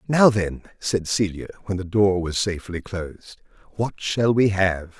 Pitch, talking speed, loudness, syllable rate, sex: 95 Hz, 170 wpm, -22 LUFS, 4.4 syllables/s, male